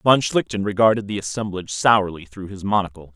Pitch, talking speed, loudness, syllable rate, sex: 100 Hz, 170 wpm, -20 LUFS, 5.8 syllables/s, male